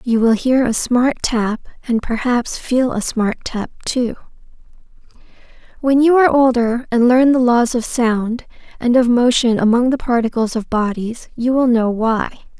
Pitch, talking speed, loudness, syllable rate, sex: 240 Hz, 165 wpm, -16 LUFS, 4.4 syllables/s, female